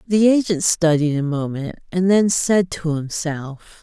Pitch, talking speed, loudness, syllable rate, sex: 170 Hz, 155 wpm, -19 LUFS, 3.9 syllables/s, female